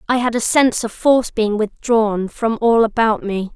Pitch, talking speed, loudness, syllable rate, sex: 225 Hz, 200 wpm, -17 LUFS, 4.8 syllables/s, female